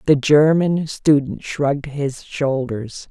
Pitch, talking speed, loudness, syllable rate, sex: 140 Hz, 115 wpm, -18 LUFS, 3.4 syllables/s, female